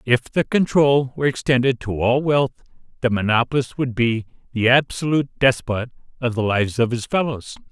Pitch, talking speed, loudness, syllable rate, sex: 125 Hz, 165 wpm, -20 LUFS, 5.4 syllables/s, male